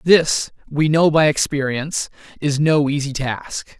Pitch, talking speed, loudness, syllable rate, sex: 145 Hz, 140 wpm, -18 LUFS, 4.1 syllables/s, male